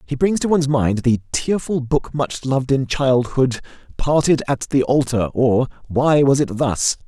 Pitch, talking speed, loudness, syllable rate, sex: 135 Hz, 180 wpm, -18 LUFS, 4.4 syllables/s, male